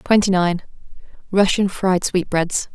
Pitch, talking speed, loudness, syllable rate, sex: 185 Hz, 85 wpm, -19 LUFS, 4.0 syllables/s, female